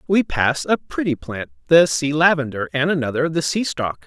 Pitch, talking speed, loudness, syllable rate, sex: 150 Hz, 190 wpm, -19 LUFS, 5.0 syllables/s, male